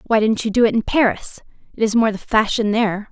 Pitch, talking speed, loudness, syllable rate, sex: 220 Hz, 230 wpm, -18 LUFS, 5.9 syllables/s, female